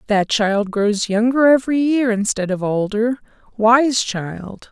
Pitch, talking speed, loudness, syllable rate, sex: 225 Hz, 125 wpm, -17 LUFS, 3.9 syllables/s, female